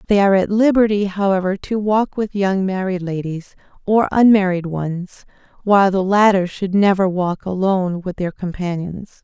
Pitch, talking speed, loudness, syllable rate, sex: 190 Hz, 155 wpm, -17 LUFS, 4.9 syllables/s, female